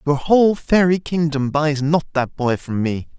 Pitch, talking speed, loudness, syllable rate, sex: 150 Hz, 190 wpm, -18 LUFS, 4.5 syllables/s, male